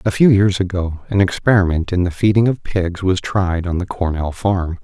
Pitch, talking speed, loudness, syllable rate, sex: 95 Hz, 210 wpm, -17 LUFS, 4.9 syllables/s, male